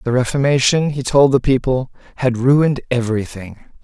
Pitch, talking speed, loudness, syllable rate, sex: 130 Hz, 140 wpm, -16 LUFS, 5.5 syllables/s, male